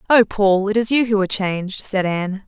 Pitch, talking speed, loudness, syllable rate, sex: 205 Hz, 245 wpm, -18 LUFS, 5.7 syllables/s, female